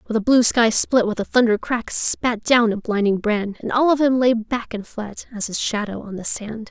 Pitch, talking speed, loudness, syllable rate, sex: 225 Hz, 250 wpm, -19 LUFS, 4.8 syllables/s, female